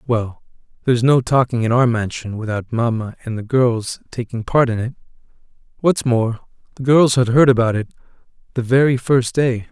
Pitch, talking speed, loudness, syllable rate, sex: 120 Hz, 175 wpm, -18 LUFS, 5.1 syllables/s, male